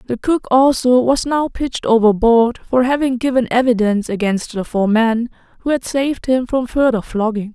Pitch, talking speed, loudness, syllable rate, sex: 240 Hz, 175 wpm, -16 LUFS, 5.1 syllables/s, female